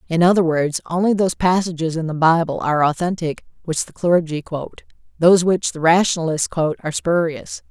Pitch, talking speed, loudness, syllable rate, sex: 165 Hz, 170 wpm, -18 LUFS, 5.8 syllables/s, female